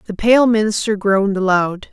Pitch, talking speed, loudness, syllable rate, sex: 205 Hz, 155 wpm, -15 LUFS, 5.1 syllables/s, female